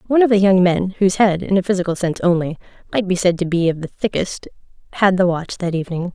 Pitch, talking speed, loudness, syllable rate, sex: 185 Hz, 245 wpm, -18 LUFS, 6.6 syllables/s, female